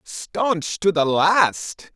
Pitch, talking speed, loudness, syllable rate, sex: 180 Hz, 125 wpm, -19 LUFS, 2.2 syllables/s, male